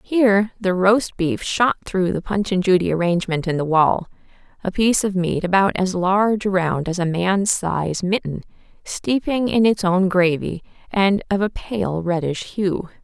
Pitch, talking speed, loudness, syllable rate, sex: 190 Hz, 175 wpm, -20 LUFS, 4.5 syllables/s, female